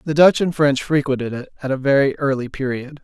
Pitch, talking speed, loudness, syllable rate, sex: 140 Hz, 220 wpm, -19 LUFS, 5.9 syllables/s, male